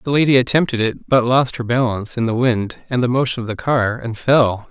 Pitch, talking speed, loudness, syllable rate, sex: 120 Hz, 240 wpm, -17 LUFS, 5.6 syllables/s, male